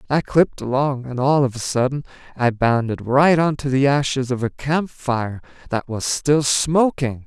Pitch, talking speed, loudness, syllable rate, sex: 135 Hz, 190 wpm, -19 LUFS, 4.5 syllables/s, male